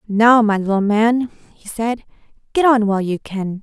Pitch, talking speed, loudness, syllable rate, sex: 220 Hz, 180 wpm, -17 LUFS, 4.6 syllables/s, female